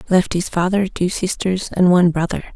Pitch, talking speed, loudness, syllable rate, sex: 180 Hz, 190 wpm, -18 LUFS, 5.3 syllables/s, female